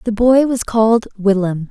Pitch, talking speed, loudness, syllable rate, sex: 220 Hz, 175 wpm, -15 LUFS, 4.7 syllables/s, female